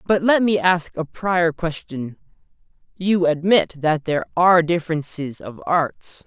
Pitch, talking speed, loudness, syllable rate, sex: 165 Hz, 145 wpm, -20 LUFS, 4.2 syllables/s, male